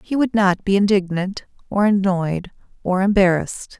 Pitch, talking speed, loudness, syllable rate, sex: 195 Hz, 140 wpm, -19 LUFS, 4.7 syllables/s, female